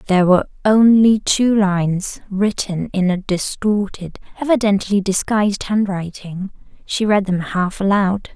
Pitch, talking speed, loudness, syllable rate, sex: 200 Hz, 120 wpm, -17 LUFS, 4.4 syllables/s, female